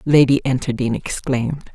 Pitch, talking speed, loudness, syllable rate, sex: 130 Hz, 105 wpm, -19 LUFS, 5.0 syllables/s, female